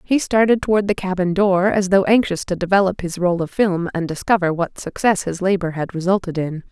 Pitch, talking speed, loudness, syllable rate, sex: 185 Hz, 215 wpm, -19 LUFS, 5.5 syllables/s, female